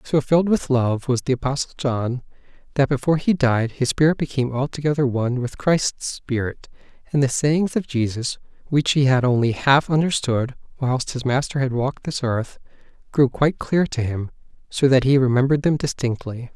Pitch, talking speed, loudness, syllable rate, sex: 135 Hz, 180 wpm, -21 LUFS, 5.3 syllables/s, male